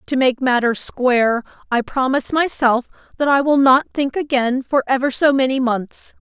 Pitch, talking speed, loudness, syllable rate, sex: 260 Hz, 170 wpm, -17 LUFS, 4.9 syllables/s, female